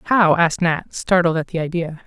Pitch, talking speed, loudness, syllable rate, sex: 170 Hz, 205 wpm, -18 LUFS, 5.4 syllables/s, female